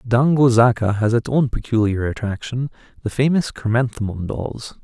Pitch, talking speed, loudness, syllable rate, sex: 120 Hz, 135 wpm, -19 LUFS, 4.8 syllables/s, male